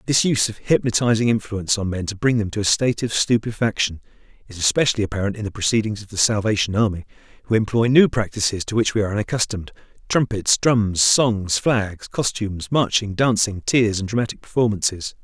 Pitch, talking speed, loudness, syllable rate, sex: 110 Hz, 175 wpm, -20 LUFS, 6.1 syllables/s, male